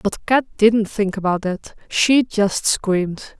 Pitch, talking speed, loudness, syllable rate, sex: 205 Hz, 160 wpm, -18 LUFS, 3.5 syllables/s, female